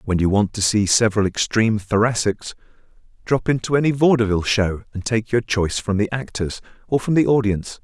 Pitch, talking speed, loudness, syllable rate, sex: 110 Hz, 185 wpm, -19 LUFS, 5.9 syllables/s, male